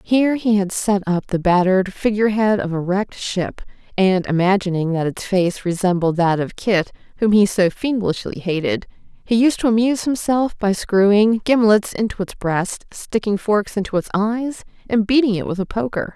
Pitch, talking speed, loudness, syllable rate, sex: 200 Hz, 180 wpm, -19 LUFS, 5.0 syllables/s, female